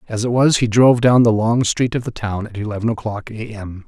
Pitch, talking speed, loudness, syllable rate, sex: 115 Hz, 265 wpm, -17 LUFS, 5.6 syllables/s, male